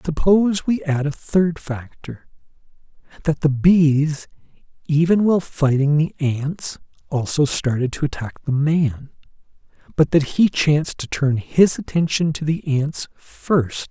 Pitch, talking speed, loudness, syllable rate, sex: 150 Hz, 140 wpm, -19 LUFS, 4.0 syllables/s, male